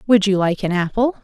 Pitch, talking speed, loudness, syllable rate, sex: 205 Hz, 245 wpm, -18 LUFS, 5.6 syllables/s, female